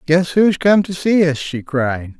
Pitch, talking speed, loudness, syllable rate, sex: 160 Hz, 245 wpm, -16 LUFS, 4.4 syllables/s, male